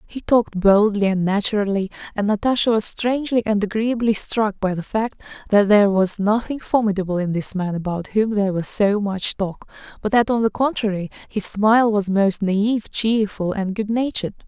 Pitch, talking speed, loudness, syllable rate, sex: 210 Hz, 180 wpm, -20 LUFS, 5.3 syllables/s, female